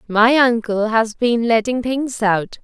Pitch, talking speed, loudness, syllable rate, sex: 230 Hz, 160 wpm, -17 LUFS, 3.7 syllables/s, female